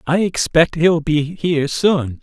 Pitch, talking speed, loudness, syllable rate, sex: 160 Hz, 160 wpm, -17 LUFS, 3.9 syllables/s, male